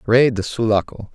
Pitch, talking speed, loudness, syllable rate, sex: 115 Hz, 155 wpm, -18 LUFS, 5.0 syllables/s, male